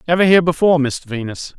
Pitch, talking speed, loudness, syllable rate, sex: 155 Hz, 190 wpm, -15 LUFS, 7.3 syllables/s, male